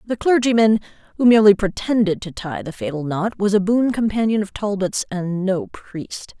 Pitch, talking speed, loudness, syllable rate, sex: 205 Hz, 180 wpm, -19 LUFS, 5.1 syllables/s, female